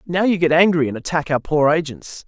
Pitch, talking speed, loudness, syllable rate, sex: 160 Hz, 235 wpm, -18 LUFS, 5.5 syllables/s, male